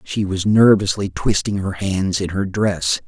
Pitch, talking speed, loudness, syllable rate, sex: 100 Hz, 175 wpm, -18 LUFS, 4.2 syllables/s, male